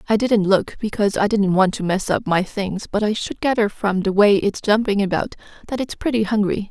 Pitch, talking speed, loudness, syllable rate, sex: 205 Hz, 235 wpm, -19 LUFS, 5.4 syllables/s, female